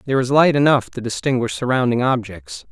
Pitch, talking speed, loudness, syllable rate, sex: 125 Hz, 175 wpm, -18 LUFS, 5.9 syllables/s, male